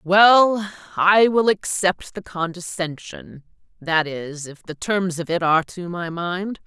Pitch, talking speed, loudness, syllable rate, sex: 180 Hz, 145 wpm, -20 LUFS, 3.7 syllables/s, female